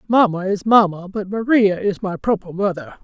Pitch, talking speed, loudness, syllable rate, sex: 195 Hz, 180 wpm, -18 LUFS, 5.0 syllables/s, female